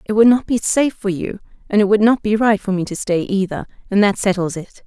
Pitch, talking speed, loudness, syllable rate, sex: 200 Hz, 270 wpm, -17 LUFS, 5.9 syllables/s, female